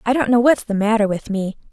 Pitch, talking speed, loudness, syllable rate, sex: 220 Hz, 280 wpm, -18 LUFS, 6.0 syllables/s, female